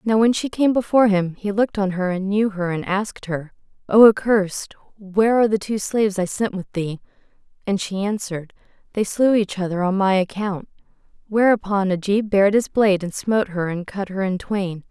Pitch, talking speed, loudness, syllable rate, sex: 200 Hz, 200 wpm, -20 LUFS, 5.5 syllables/s, female